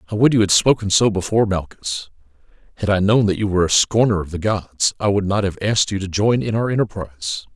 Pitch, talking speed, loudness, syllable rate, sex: 100 Hz, 240 wpm, -18 LUFS, 6.2 syllables/s, male